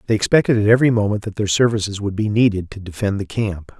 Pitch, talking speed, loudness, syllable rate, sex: 105 Hz, 235 wpm, -18 LUFS, 6.7 syllables/s, male